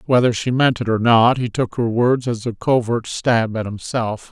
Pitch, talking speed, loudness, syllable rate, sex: 120 Hz, 225 wpm, -18 LUFS, 4.6 syllables/s, male